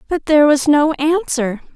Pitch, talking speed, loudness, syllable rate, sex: 295 Hz, 170 wpm, -15 LUFS, 4.7 syllables/s, female